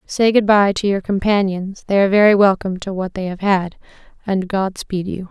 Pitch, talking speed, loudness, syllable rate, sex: 195 Hz, 215 wpm, -17 LUFS, 5.3 syllables/s, female